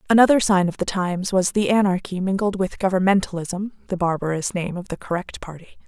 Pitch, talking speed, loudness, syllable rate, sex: 190 Hz, 185 wpm, -21 LUFS, 4.5 syllables/s, female